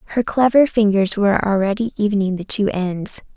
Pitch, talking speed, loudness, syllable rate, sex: 205 Hz, 160 wpm, -18 LUFS, 5.6 syllables/s, female